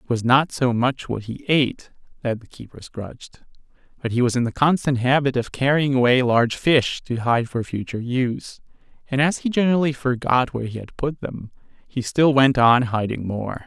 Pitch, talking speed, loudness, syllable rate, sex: 130 Hz, 200 wpm, -21 LUFS, 5.2 syllables/s, male